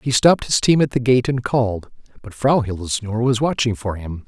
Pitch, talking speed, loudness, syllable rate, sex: 115 Hz, 225 wpm, -19 LUFS, 5.7 syllables/s, male